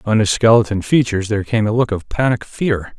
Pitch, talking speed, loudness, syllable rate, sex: 110 Hz, 220 wpm, -16 LUFS, 6.0 syllables/s, male